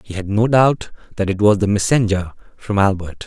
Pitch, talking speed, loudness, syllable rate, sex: 100 Hz, 200 wpm, -17 LUFS, 5.2 syllables/s, male